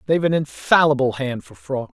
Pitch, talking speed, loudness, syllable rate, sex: 145 Hz, 180 wpm, -20 LUFS, 5.6 syllables/s, female